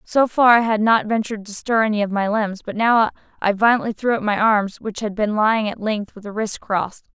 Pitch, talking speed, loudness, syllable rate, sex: 215 Hz, 245 wpm, -19 LUFS, 5.6 syllables/s, female